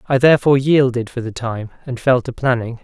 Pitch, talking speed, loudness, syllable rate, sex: 125 Hz, 210 wpm, -17 LUFS, 5.8 syllables/s, male